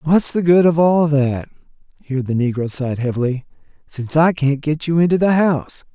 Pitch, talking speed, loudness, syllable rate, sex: 150 Hz, 190 wpm, -17 LUFS, 4.2 syllables/s, male